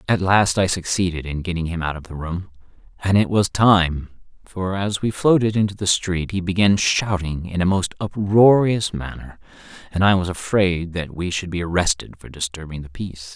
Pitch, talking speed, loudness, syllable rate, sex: 90 Hz, 195 wpm, -20 LUFS, 5.0 syllables/s, male